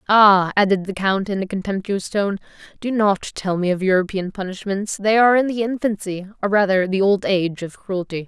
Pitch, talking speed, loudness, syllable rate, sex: 195 Hz, 195 wpm, -19 LUFS, 5.4 syllables/s, female